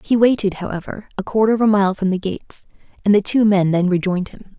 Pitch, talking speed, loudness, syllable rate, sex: 200 Hz, 235 wpm, -18 LUFS, 6.2 syllables/s, female